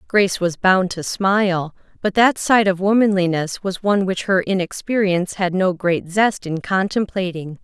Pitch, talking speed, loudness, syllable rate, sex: 190 Hz, 165 wpm, -19 LUFS, 4.7 syllables/s, female